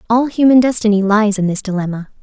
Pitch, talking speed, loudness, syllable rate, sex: 215 Hz, 190 wpm, -14 LUFS, 6.2 syllables/s, female